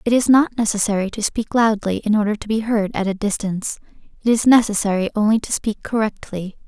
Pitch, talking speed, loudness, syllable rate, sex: 215 Hz, 200 wpm, -19 LUFS, 5.9 syllables/s, female